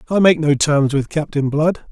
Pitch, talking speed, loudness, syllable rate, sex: 150 Hz, 220 wpm, -16 LUFS, 4.8 syllables/s, male